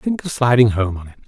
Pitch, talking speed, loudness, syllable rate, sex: 125 Hz, 285 wpm, -17 LUFS, 6.0 syllables/s, male